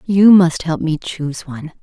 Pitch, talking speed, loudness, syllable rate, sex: 165 Hz, 195 wpm, -14 LUFS, 4.8 syllables/s, female